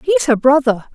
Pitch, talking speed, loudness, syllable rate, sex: 275 Hz, 190 wpm, -14 LUFS, 4.8 syllables/s, female